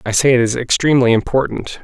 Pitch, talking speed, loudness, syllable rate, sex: 125 Hz, 195 wpm, -15 LUFS, 6.4 syllables/s, male